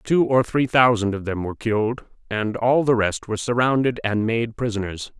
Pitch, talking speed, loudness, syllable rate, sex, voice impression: 115 Hz, 195 wpm, -21 LUFS, 5.2 syllables/s, male, very masculine, very adult-like, slightly old, very thick, very tensed, powerful, bright, slightly hard, slightly clear, fluent, cool, intellectual, slightly refreshing, very sincere, very calm, very mature, friendly, very reassuring, unique, very elegant, wild, sweet, lively, kind, slightly modest